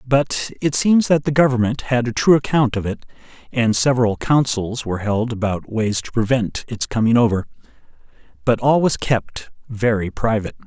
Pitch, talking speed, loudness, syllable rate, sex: 120 Hz, 170 wpm, -19 LUFS, 5.0 syllables/s, male